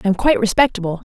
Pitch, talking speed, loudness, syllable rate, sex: 210 Hz, 215 wpm, -17 LUFS, 8.4 syllables/s, female